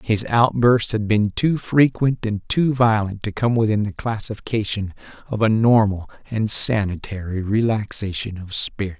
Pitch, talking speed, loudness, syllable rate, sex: 110 Hz, 145 wpm, -20 LUFS, 4.5 syllables/s, male